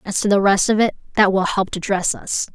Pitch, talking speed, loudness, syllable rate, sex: 200 Hz, 285 wpm, -18 LUFS, 5.6 syllables/s, female